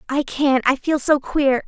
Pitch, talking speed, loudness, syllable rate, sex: 275 Hz, 215 wpm, -19 LUFS, 4.1 syllables/s, female